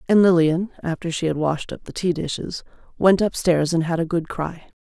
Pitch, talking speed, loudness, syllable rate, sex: 170 Hz, 210 wpm, -21 LUFS, 5.2 syllables/s, female